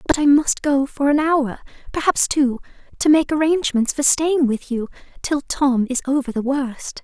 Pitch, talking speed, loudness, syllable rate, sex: 280 Hz, 190 wpm, -19 LUFS, 4.7 syllables/s, female